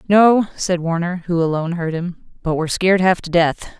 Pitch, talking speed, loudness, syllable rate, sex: 175 Hz, 205 wpm, -18 LUFS, 5.5 syllables/s, female